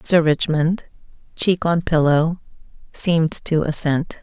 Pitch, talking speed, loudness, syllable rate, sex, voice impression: 160 Hz, 115 wpm, -19 LUFS, 3.8 syllables/s, female, feminine, adult-like, slightly thin, tensed, slightly weak, clear, nasal, calm, friendly, reassuring, slightly sharp